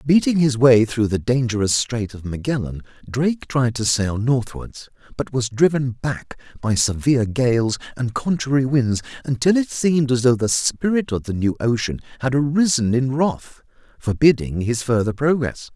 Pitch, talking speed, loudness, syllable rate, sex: 125 Hz, 165 wpm, -20 LUFS, 4.7 syllables/s, male